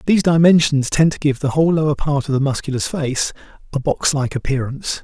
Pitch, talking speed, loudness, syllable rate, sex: 145 Hz, 205 wpm, -18 LUFS, 6.0 syllables/s, male